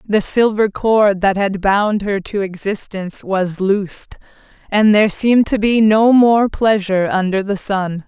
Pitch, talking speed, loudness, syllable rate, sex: 205 Hz, 165 wpm, -15 LUFS, 4.3 syllables/s, female